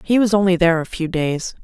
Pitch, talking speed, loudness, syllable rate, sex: 180 Hz, 255 wpm, -18 LUFS, 6.1 syllables/s, female